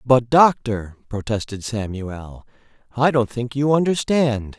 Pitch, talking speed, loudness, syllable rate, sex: 120 Hz, 120 wpm, -20 LUFS, 3.9 syllables/s, male